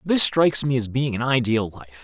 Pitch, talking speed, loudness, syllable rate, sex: 130 Hz, 235 wpm, -20 LUFS, 5.4 syllables/s, male